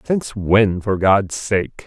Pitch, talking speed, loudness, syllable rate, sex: 105 Hz, 160 wpm, -18 LUFS, 4.0 syllables/s, male